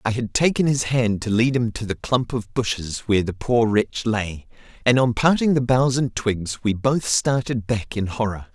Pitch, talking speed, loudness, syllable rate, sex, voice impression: 115 Hz, 220 wpm, -21 LUFS, 4.6 syllables/s, male, very masculine, very adult-like, very middle-aged, very thick, very tensed, very powerful, bright, soft, very clear, fluent, very cool, very intellectual, slightly refreshing, very sincere, very calm, very mature, friendly, very reassuring, very unique, very elegant, slightly wild, sweet, very lively, very kind, slightly intense